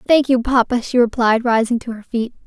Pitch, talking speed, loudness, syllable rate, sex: 240 Hz, 220 wpm, -17 LUFS, 5.5 syllables/s, female